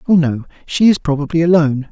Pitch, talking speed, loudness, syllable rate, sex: 155 Hz, 190 wpm, -15 LUFS, 6.5 syllables/s, male